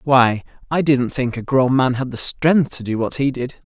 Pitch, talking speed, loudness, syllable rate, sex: 130 Hz, 240 wpm, -18 LUFS, 4.6 syllables/s, male